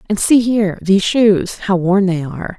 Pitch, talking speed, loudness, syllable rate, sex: 200 Hz, 165 wpm, -14 LUFS, 5.0 syllables/s, female